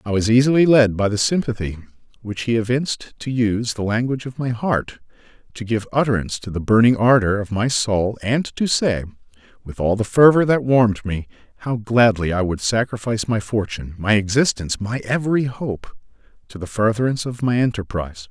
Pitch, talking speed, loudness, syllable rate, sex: 115 Hz, 180 wpm, -19 LUFS, 5.7 syllables/s, male